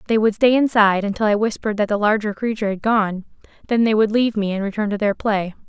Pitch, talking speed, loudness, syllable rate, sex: 210 Hz, 245 wpm, -19 LUFS, 6.7 syllables/s, female